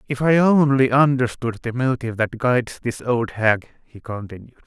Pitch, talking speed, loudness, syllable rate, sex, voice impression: 125 Hz, 165 wpm, -20 LUFS, 5.0 syllables/s, male, very masculine, very adult-like, old, thick, tensed, slightly powerful, slightly bright, slightly soft, slightly muffled, fluent, cool, intellectual, very sincere, very calm, mature, friendly, reassuring, slightly unique, very elegant, slightly sweet, lively, very kind, slightly modest